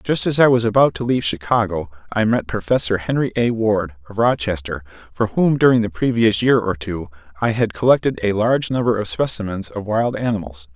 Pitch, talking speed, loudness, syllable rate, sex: 105 Hz, 195 wpm, -19 LUFS, 5.6 syllables/s, male